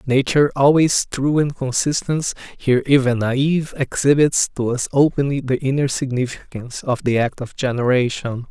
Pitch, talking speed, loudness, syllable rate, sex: 135 Hz, 140 wpm, -18 LUFS, 5.0 syllables/s, male